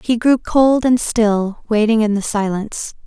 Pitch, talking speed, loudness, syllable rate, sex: 225 Hz, 175 wpm, -16 LUFS, 4.2 syllables/s, female